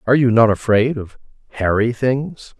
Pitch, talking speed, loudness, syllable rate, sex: 120 Hz, 160 wpm, -17 LUFS, 4.9 syllables/s, male